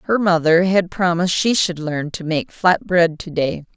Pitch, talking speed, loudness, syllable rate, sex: 170 Hz, 205 wpm, -18 LUFS, 4.6 syllables/s, female